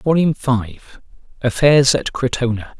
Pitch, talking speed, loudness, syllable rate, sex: 130 Hz, 85 wpm, -17 LUFS, 4.3 syllables/s, male